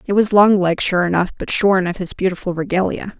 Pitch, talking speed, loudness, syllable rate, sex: 185 Hz, 225 wpm, -17 LUFS, 5.7 syllables/s, female